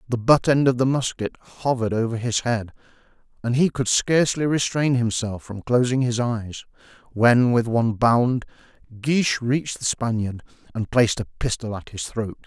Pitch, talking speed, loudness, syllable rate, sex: 120 Hz, 170 wpm, -22 LUFS, 4.9 syllables/s, male